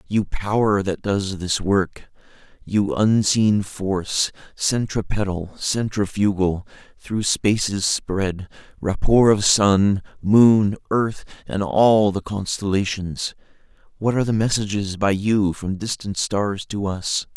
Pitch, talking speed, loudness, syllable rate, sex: 100 Hz, 120 wpm, -21 LUFS, 3.6 syllables/s, male